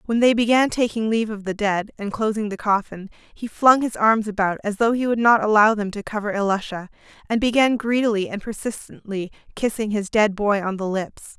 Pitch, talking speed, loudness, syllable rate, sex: 215 Hz, 205 wpm, -21 LUFS, 5.4 syllables/s, female